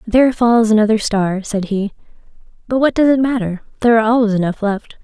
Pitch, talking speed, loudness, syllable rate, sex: 220 Hz, 190 wpm, -15 LUFS, 6.1 syllables/s, female